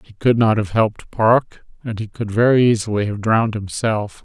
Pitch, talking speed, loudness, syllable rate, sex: 110 Hz, 200 wpm, -18 LUFS, 5.0 syllables/s, male